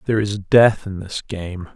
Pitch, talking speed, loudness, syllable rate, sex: 100 Hz, 205 wpm, -19 LUFS, 4.7 syllables/s, male